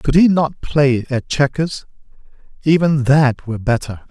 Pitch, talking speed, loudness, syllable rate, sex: 140 Hz, 145 wpm, -16 LUFS, 4.3 syllables/s, male